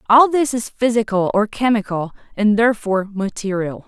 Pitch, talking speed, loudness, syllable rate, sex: 215 Hz, 140 wpm, -18 LUFS, 5.3 syllables/s, female